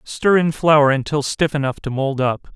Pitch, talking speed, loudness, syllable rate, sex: 145 Hz, 210 wpm, -18 LUFS, 4.5 syllables/s, male